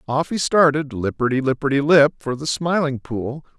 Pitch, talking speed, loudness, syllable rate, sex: 140 Hz, 170 wpm, -19 LUFS, 4.9 syllables/s, male